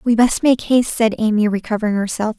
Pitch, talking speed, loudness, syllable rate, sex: 220 Hz, 200 wpm, -17 LUFS, 6.2 syllables/s, female